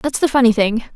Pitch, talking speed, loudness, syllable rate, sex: 245 Hz, 250 wpm, -15 LUFS, 6.0 syllables/s, female